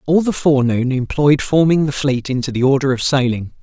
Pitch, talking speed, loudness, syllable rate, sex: 140 Hz, 200 wpm, -16 LUFS, 5.6 syllables/s, male